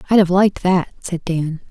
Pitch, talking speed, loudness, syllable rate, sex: 180 Hz, 210 wpm, -18 LUFS, 5.4 syllables/s, female